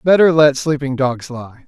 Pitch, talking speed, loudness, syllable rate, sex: 140 Hz, 180 wpm, -14 LUFS, 4.6 syllables/s, male